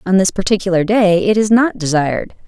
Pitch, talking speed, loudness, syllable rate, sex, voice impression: 190 Hz, 195 wpm, -14 LUFS, 5.7 syllables/s, female, feminine, slightly adult-like, slightly fluent, slightly cute, friendly, slightly kind